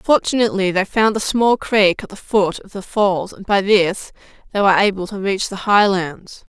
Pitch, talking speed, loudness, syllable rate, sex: 200 Hz, 200 wpm, -17 LUFS, 4.8 syllables/s, female